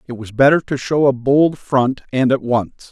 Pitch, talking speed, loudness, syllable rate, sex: 130 Hz, 225 wpm, -16 LUFS, 4.4 syllables/s, male